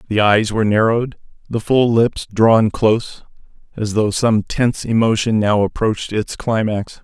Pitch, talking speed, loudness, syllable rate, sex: 110 Hz, 155 wpm, -17 LUFS, 4.7 syllables/s, male